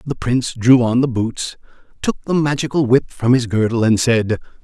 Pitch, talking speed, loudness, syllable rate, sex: 120 Hz, 195 wpm, -17 LUFS, 5.1 syllables/s, male